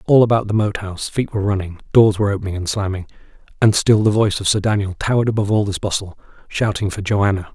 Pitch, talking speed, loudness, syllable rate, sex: 100 Hz, 225 wpm, -18 LUFS, 7.0 syllables/s, male